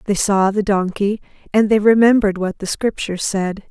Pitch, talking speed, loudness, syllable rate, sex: 205 Hz, 180 wpm, -17 LUFS, 5.4 syllables/s, female